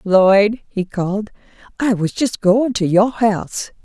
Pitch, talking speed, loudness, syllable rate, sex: 205 Hz, 155 wpm, -17 LUFS, 3.9 syllables/s, female